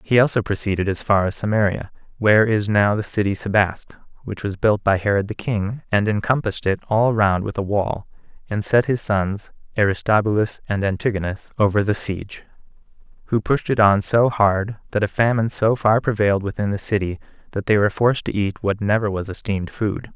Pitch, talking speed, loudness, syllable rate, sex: 105 Hz, 190 wpm, -20 LUFS, 5.7 syllables/s, male